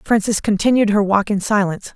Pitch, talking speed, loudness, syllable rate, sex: 205 Hz, 185 wpm, -17 LUFS, 6.0 syllables/s, female